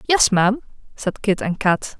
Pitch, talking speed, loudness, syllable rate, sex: 215 Hz, 180 wpm, -19 LUFS, 4.7 syllables/s, female